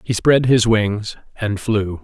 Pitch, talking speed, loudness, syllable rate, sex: 110 Hz, 175 wpm, -17 LUFS, 3.5 syllables/s, male